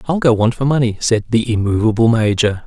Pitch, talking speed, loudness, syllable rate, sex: 115 Hz, 205 wpm, -15 LUFS, 5.7 syllables/s, male